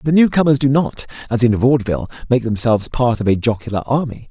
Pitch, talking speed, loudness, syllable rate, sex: 125 Hz, 195 wpm, -17 LUFS, 6.5 syllables/s, male